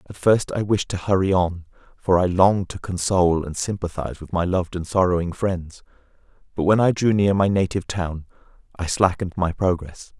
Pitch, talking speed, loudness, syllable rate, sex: 90 Hz, 190 wpm, -21 LUFS, 5.6 syllables/s, male